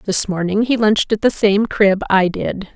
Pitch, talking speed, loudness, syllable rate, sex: 205 Hz, 220 wpm, -16 LUFS, 4.8 syllables/s, female